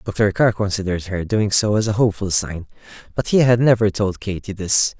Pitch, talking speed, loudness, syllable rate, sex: 100 Hz, 205 wpm, -19 LUFS, 5.5 syllables/s, male